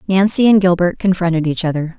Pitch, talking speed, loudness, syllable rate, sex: 180 Hz, 180 wpm, -14 LUFS, 6.0 syllables/s, female